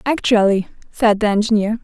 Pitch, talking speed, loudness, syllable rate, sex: 215 Hz, 130 wpm, -16 LUFS, 5.3 syllables/s, female